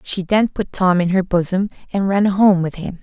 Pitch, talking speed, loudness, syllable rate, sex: 190 Hz, 240 wpm, -17 LUFS, 4.8 syllables/s, female